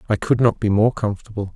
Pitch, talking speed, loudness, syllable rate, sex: 105 Hz, 230 wpm, -19 LUFS, 6.7 syllables/s, male